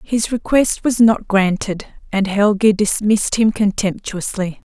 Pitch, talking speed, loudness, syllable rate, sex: 205 Hz, 125 wpm, -17 LUFS, 4.2 syllables/s, female